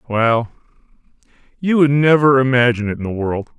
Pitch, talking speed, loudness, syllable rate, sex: 125 Hz, 150 wpm, -16 LUFS, 5.6 syllables/s, male